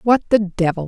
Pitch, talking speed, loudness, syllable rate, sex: 200 Hz, 205 wpm, -18 LUFS, 5.5 syllables/s, female